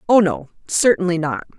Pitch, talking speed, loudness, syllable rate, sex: 185 Hz, 150 wpm, -18 LUFS, 5.4 syllables/s, female